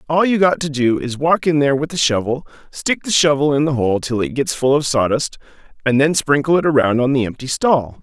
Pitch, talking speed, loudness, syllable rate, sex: 140 Hz, 245 wpm, -17 LUFS, 5.6 syllables/s, male